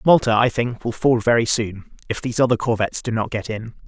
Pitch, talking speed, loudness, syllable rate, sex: 115 Hz, 230 wpm, -20 LUFS, 6.2 syllables/s, male